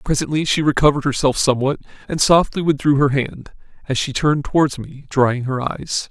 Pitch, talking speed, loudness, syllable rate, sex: 140 Hz, 175 wpm, -18 LUFS, 5.6 syllables/s, male